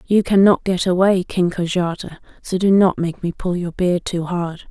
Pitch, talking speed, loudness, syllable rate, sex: 180 Hz, 205 wpm, -18 LUFS, 4.6 syllables/s, female